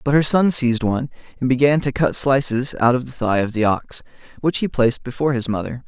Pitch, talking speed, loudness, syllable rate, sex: 130 Hz, 235 wpm, -19 LUFS, 6.1 syllables/s, male